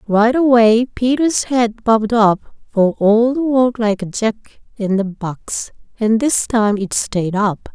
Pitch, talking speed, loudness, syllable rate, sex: 225 Hz, 170 wpm, -16 LUFS, 3.8 syllables/s, female